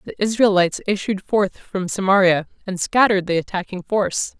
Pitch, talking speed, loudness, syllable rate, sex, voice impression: 195 Hz, 150 wpm, -19 LUFS, 5.5 syllables/s, female, very feminine, very adult-like, slightly thin, tensed, slightly powerful, slightly bright, hard, very clear, fluent, raspy, cool, very intellectual, very refreshing, sincere, calm, very friendly, reassuring, unique, elegant, very wild, sweet, very lively, kind, slightly intense, slightly light